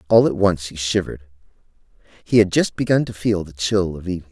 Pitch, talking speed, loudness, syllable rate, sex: 95 Hz, 210 wpm, -19 LUFS, 6.2 syllables/s, male